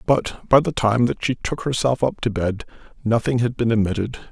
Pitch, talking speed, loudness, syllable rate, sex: 120 Hz, 210 wpm, -21 LUFS, 5.2 syllables/s, male